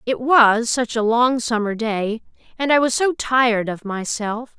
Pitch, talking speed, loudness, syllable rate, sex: 235 Hz, 185 wpm, -19 LUFS, 4.1 syllables/s, female